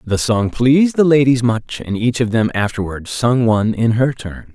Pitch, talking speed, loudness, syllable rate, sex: 115 Hz, 210 wpm, -16 LUFS, 4.8 syllables/s, male